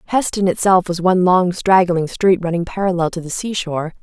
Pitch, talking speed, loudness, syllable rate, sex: 180 Hz, 180 wpm, -17 LUFS, 5.6 syllables/s, female